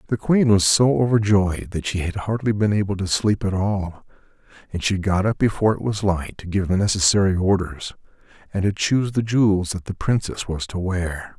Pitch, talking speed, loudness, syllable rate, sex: 100 Hz, 205 wpm, -21 LUFS, 5.2 syllables/s, male